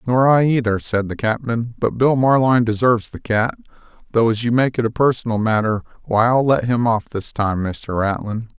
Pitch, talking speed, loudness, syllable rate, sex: 115 Hz, 200 wpm, -18 LUFS, 5.2 syllables/s, male